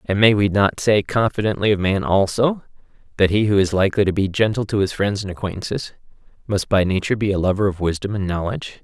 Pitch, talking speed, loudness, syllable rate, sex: 100 Hz, 215 wpm, -19 LUFS, 6.3 syllables/s, male